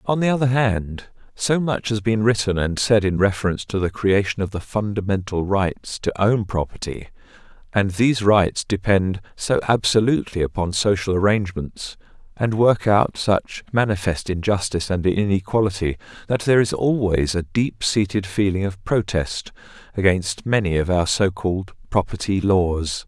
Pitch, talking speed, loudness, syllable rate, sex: 100 Hz, 150 wpm, -21 LUFS, 4.8 syllables/s, male